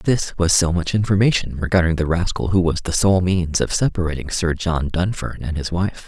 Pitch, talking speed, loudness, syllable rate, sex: 90 Hz, 205 wpm, -19 LUFS, 5.2 syllables/s, male